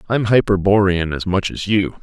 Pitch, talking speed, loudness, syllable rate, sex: 95 Hz, 175 wpm, -17 LUFS, 4.9 syllables/s, male